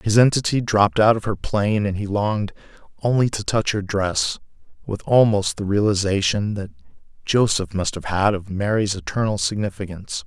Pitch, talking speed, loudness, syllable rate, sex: 100 Hz, 165 wpm, -21 LUFS, 5.3 syllables/s, male